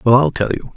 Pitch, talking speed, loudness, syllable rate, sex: 105 Hz, 315 wpm, -16 LUFS, 6.2 syllables/s, male